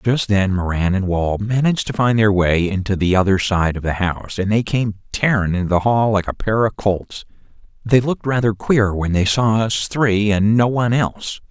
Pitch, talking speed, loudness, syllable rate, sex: 105 Hz, 220 wpm, -18 LUFS, 5.1 syllables/s, male